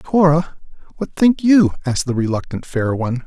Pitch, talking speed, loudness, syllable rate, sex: 150 Hz, 165 wpm, -17 LUFS, 5.2 syllables/s, male